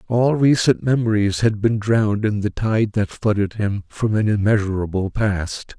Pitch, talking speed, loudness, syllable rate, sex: 105 Hz, 165 wpm, -19 LUFS, 4.5 syllables/s, male